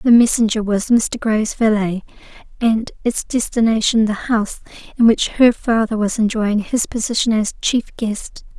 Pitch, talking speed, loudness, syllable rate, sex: 220 Hz, 155 wpm, -17 LUFS, 4.5 syllables/s, female